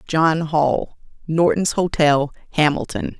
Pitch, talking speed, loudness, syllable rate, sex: 155 Hz, 95 wpm, -19 LUFS, 3.6 syllables/s, female